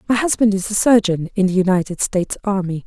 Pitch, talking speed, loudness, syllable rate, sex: 200 Hz, 210 wpm, -17 LUFS, 6.2 syllables/s, female